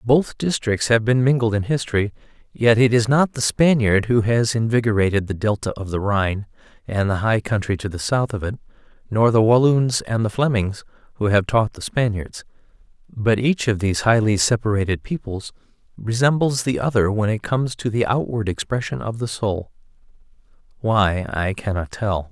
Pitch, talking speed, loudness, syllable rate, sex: 110 Hz, 175 wpm, -20 LUFS, 5.1 syllables/s, male